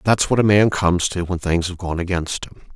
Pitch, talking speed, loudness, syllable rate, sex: 90 Hz, 260 wpm, -19 LUFS, 5.8 syllables/s, male